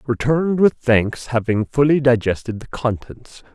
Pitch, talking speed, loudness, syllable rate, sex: 125 Hz, 135 wpm, -18 LUFS, 4.5 syllables/s, male